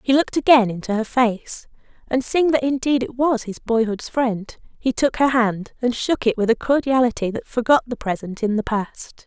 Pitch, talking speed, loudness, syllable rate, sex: 240 Hz, 205 wpm, -20 LUFS, 5.0 syllables/s, female